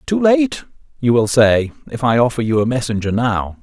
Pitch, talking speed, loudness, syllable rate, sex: 130 Hz, 200 wpm, -16 LUFS, 5.1 syllables/s, male